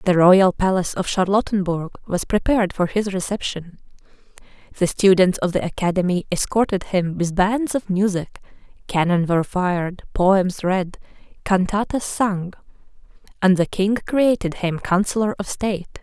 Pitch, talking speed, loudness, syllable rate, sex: 190 Hz, 135 wpm, -20 LUFS, 4.8 syllables/s, female